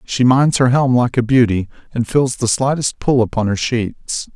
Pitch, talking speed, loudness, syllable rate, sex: 120 Hz, 205 wpm, -16 LUFS, 4.5 syllables/s, male